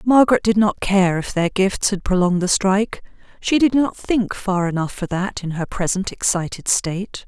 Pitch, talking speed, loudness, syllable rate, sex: 195 Hz, 200 wpm, -19 LUFS, 5.0 syllables/s, female